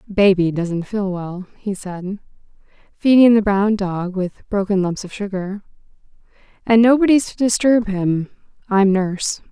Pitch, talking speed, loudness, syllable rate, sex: 200 Hz, 130 wpm, -18 LUFS, 4.3 syllables/s, female